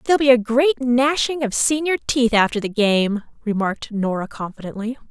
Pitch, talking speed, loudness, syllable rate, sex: 240 Hz, 165 wpm, -19 LUFS, 5.4 syllables/s, female